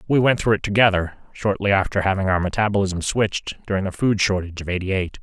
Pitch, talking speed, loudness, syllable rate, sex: 100 Hz, 205 wpm, -21 LUFS, 6.4 syllables/s, male